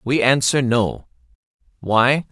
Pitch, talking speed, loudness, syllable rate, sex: 125 Hz, 105 wpm, -18 LUFS, 3.4 syllables/s, male